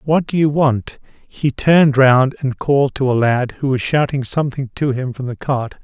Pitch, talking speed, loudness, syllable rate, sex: 135 Hz, 215 wpm, -16 LUFS, 4.8 syllables/s, male